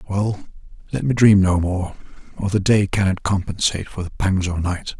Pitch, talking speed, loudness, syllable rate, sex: 95 Hz, 180 wpm, -20 LUFS, 5.2 syllables/s, male